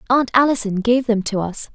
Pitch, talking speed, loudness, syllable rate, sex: 230 Hz, 205 wpm, -18 LUFS, 5.3 syllables/s, female